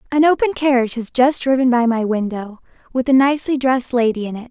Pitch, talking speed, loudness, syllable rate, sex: 250 Hz, 215 wpm, -17 LUFS, 6.3 syllables/s, female